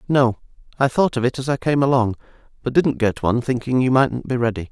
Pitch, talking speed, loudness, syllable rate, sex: 125 Hz, 230 wpm, -20 LUFS, 5.9 syllables/s, male